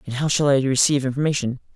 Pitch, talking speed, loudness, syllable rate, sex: 135 Hz, 205 wpm, -20 LUFS, 7.3 syllables/s, male